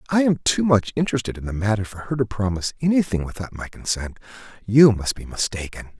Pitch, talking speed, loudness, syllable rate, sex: 115 Hz, 190 wpm, -21 LUFS, 6.2 syllables/s, male